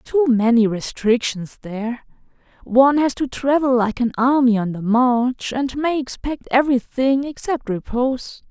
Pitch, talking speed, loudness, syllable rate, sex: 250 Hz, 140 wpm, -19 LUFS, 4.4 syllables/s, female